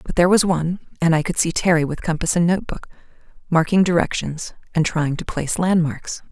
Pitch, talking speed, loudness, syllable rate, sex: 170 Hz, 190 wpm, -20 LUFS, 6.1 syllables/s, female